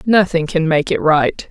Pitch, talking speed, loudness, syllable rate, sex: 170 Hz, 200 wpm, -15 LUFS, 4.3 syllables/s, female